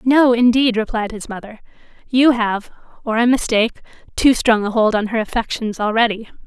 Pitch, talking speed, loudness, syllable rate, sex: 225 Hz, 165 wpm, -17 LUFS, 5.3 syllables/s, female